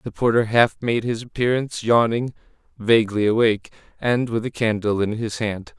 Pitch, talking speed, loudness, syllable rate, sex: 115 Hz, 165 wpm, -21 LUFS, 5.2 syllables/s, male